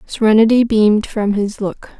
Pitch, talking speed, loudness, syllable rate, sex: 215 Hz, 150 wpm, -14 LUFS, 5.0 syllables/s, female